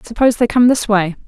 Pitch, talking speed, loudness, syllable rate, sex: 225 Hz, 235 wpm, -14 LUFS, 6.4 syllables/s, female